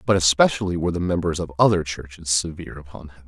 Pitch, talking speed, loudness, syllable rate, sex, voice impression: 85 Hz, 200 wpm, -21 LUFS, 7.0 syllables/s, male, very masculine, very middle-aged, very thick, tensed, very powerful, slightly bright, slightly soft, muffled, fluent, slightly raspy, very cool, intellectual, refreshing, sincere, very calm, friendly, very reassuring, unique, elegant, wild, very sweet, lively, kind, slightly modest